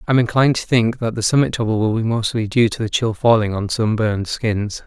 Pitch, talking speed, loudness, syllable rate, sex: 115 Hz, 235 wpm, -18 LUFS, 5.7 syllables/s, male